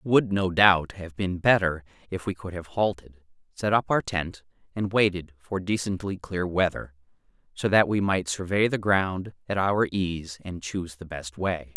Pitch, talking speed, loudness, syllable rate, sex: 90 Hz, 190 wpm, -26 LUFS, 4.5 syllables/s, male